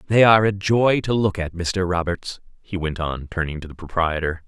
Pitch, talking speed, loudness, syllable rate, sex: 90 Hz, 215 wpm, -21 LUFS, 5.2 syllables/s, male